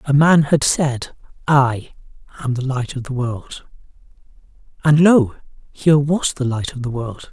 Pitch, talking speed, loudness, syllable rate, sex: 135 Hz, 165 wpm, -17 LUFS, 4.2 syllables/s, male